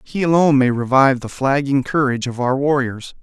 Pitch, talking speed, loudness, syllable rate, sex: 135 Hz, 185 wpm, -17 LUFS, 5.8 syllables/s, male